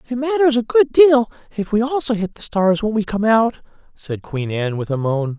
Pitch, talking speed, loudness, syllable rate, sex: 195 Hz, 235 wpm, -18 LUFS, 5.2 syllables/s, male